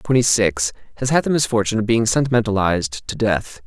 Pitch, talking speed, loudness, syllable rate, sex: 110 Hz, 180 wpm, -19 LUFS, 6.1 syllables/s, male